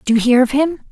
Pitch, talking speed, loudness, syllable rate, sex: 260 Hz, 330 wpm, -14 LUFS, 7.1 syllables/s, female